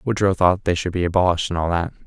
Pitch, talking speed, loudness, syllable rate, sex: 90 Hz, 260 wpm, -20 LUFS, 7.1 syllables/s, male